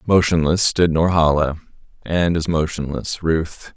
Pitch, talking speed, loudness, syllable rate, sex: 80 Hz, 110 wpm, -18 LUFS, 4.1 syllables/s, male